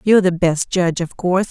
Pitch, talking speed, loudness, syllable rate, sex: 180 Hz, 240 wpm, -17 LUFS, 6.4 syllables/s, female